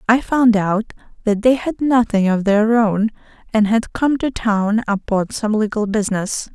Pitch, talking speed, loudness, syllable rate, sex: 220 Hz, 175 wpm, -17 LUFS, 4.3 syllables/s, female